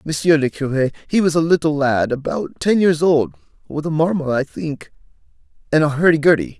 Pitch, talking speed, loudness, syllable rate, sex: 145 Hz, 190 wpm, -18 LUFS, 5.2 syllables/s, male